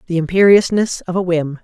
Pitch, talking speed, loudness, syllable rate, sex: 180 Hz, 185 wpm, -15 LUFS, 5.7 syllables/s, female